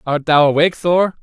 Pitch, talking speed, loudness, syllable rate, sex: 160 Hz, 195 wpm, -14 LUFS, 5.6 syllables/s, male